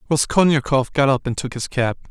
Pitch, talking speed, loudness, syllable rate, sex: 135 Hz, 200 wpm, -19 LUFS, 5.6 syllables/s, male